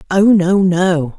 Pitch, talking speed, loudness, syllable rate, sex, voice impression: 185 Hz, 150 wpm, -13 LUFS, 3.1 syllables/s, female, feminine, middle-aged, tensed, slightly weak, soft, fluent, intellectual, calm, friendly, reassuring, elegant, slightly modest